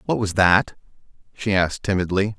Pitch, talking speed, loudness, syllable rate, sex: 95 Hz, 150 wpm, -20 LUFS, 5.4 syllables/s, male